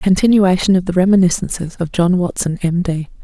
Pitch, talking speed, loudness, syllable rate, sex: 180 Hz, 185 wpm, -15 LUFS, 5.9 syllables/s, female